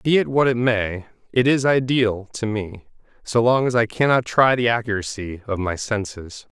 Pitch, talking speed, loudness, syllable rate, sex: 115 Hz, 190 wpm, -20 LUFS, 4.7 syllables/s, male